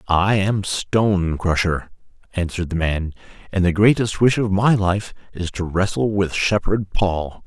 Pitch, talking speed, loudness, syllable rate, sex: 95 Hz, 160 wpm, -20 LUFS, 4.3 syllables/s, male